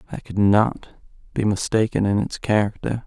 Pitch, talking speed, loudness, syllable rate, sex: 105 Hz, 155 wpm, -21 LUFS, 4.9 syllables/s, male